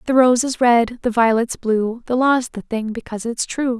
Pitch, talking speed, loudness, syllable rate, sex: 235 Hz, 220 wpm, -18 LUFS, 4.8 syllables/s, female